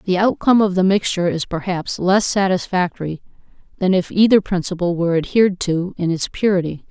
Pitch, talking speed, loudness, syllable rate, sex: 185 Hz, 165 wpm, -18 LUFS, 5.8 syllables/s, female